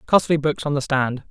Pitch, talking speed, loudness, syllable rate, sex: 140 Hz, 230 wpm, -21 LUFS, 5.3 syllables/s, male